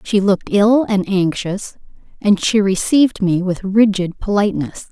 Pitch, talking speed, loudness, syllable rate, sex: 200 Hz, 145 wpm, -16 LUFS, 4.6 syllables/s, female